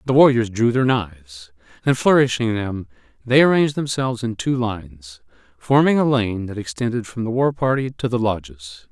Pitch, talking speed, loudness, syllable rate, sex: 115 Hz, 175 wpm, -19 LUFS, 5.2 syllables/s, male